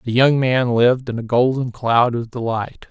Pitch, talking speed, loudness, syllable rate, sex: 120 Hz, 205 wpm, -18 LUFS, 4.7 syllables/s, male